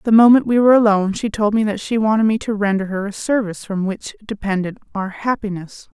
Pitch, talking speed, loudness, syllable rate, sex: 210 Hz, 220 wpm, -18 LUFS, 6.1 syllables/s, female